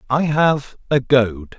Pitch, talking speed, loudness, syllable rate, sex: 135 Hz, 150 wpm, -18 LUFS, 3.2 syllables/s, male